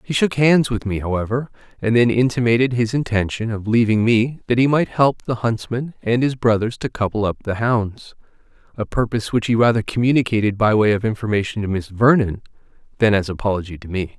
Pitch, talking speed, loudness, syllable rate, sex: 115 Hz, 190 wpm, -19 LUFS, 5.8 syllables/s, male